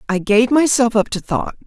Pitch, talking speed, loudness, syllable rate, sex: 225 Hz, 215 wpm, -16 LUFS, 5.0 syllables/s, female